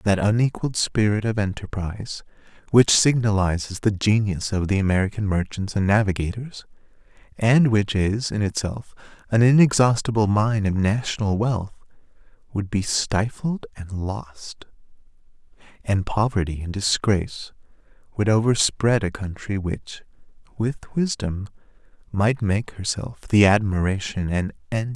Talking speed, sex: 125 wpm, male